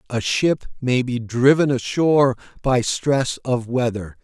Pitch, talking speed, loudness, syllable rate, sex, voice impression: 125 Hz, 140 wpm, -20 LUFS, 3.9 syllables/s, male, masculine, very adult-like, cool, slightly intellectual, slightly wild